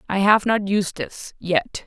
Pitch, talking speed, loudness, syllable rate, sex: 195 Hz, 160 wpm, -21 LUFS, 3.6 syllables/s, female